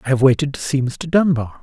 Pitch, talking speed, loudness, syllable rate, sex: 140 Hz, 260 wpm, -18 LUFS, 6.0 syllables/s, male